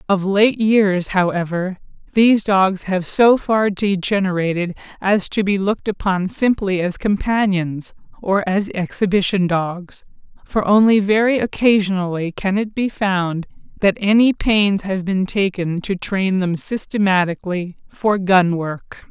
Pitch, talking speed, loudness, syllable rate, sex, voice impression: 195 Hz, 135 wpm, -18 LUFS, 4.2 syllables/s, female, very feminine, very adult-like, middle-aged, slightly thin, very tensed, powerful, bright, very hard, slightly clear, fluent, cool, very intellectual, very sincere, very calm, very reassuring, slightly unique, slightly elegant, wild, strict, slightly sharp